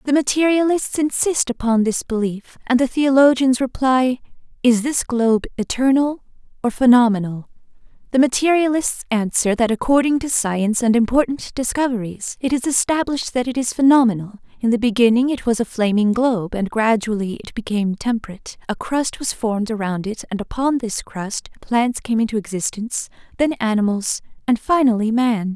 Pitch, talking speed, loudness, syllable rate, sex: 240 Hz, 155 wpm, -19 LUFS, 5.3 syllables/s, female